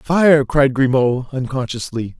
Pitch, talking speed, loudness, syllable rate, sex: 135 Hz, 110 wpm, -17 LUFS, 3.8 syllables/s, male